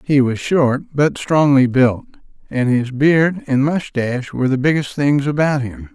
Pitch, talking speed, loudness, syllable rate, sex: 135 Hz, 170 wpm, -16 LUFS, 4.4 syllables/s, male